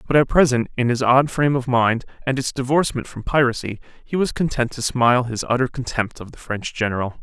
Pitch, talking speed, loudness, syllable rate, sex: 125 Hz, 215 wpm, -20 LUFS, 6.0 syllables/s, male